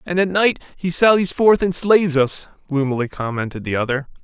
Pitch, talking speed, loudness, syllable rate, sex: 160 Hz, 185 wpm, -18 LUFS, 5.3 syllables/s, male